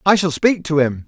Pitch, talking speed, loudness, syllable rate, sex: 160 Hz, 280 wpm, -17 LUFS, 5.3 syllables/s, male